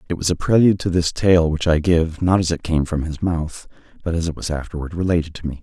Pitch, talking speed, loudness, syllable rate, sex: 85 Hz, 265 wpm, -19 LUFS, 6.1 syllables/s, male